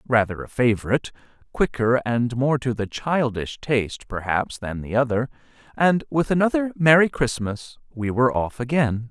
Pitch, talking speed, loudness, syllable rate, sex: 125 Hz, 140 wpm, -22 LUFS, 4.9 syllables/s, male